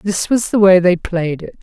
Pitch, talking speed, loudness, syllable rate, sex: 185 Hz, 260 wpm, -14 LUFS, 4.5 syllables/s, female